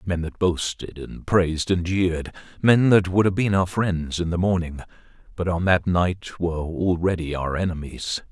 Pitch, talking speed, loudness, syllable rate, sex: 90 Hz, 175 wpm, -22 LUFS, 4.6 syllables/s, male